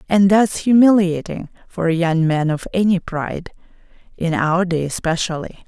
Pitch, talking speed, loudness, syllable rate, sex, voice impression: 175 Hz, 150 wpm, -17 LUFS, 4.9 syllables/s, female, feminine, slightly gender-neutral, adult-like, slightly middle-aged, thin, slightly tensed, slightly powerful, slightly bright, hard, clear, slightly fluent, slightly cute, slightly cool, intellectual, refreshing, sincere, very calm, reassuring, very unique, elegant, very kind, very modest